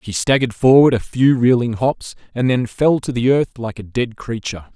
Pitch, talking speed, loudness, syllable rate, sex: 120 Hz, 215 wpm, -17 LUFS, 5.2 syllables/s, male